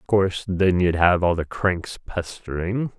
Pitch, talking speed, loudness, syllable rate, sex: 90 Hz, 160 wpm, -22 LUFS, 4.1 syllables/s, male